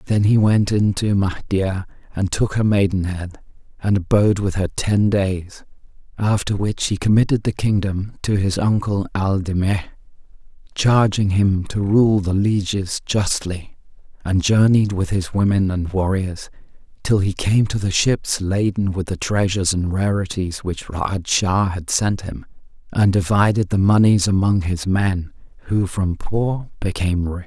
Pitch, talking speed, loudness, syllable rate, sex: 100 Hz, 155 wpm, -19 LUFS, 4.3 syllables/s, male